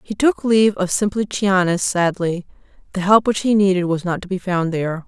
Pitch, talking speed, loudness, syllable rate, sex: 190 Hz, 200 wpm, -18 LUFS, 5.4 syllables/s, female